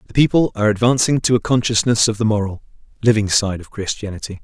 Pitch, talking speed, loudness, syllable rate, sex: 110 Hz, 190 wpm, -17 LUFS, 6.5 syllables/s, male